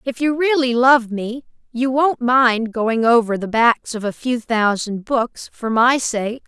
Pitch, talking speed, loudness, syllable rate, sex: 240 Hz, 185 wpm, -18 LUFS, 3.8 syllables/s, female